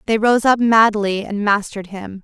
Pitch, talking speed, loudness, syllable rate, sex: 210 Hz, 190 wpm, -16 LUFS, 4.8 syllables/s, female